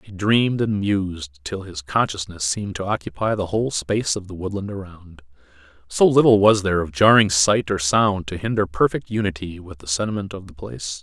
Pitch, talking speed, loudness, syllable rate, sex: 95 Hz, 195 wpm, -20 LUFS, 5.6 syllables/s, male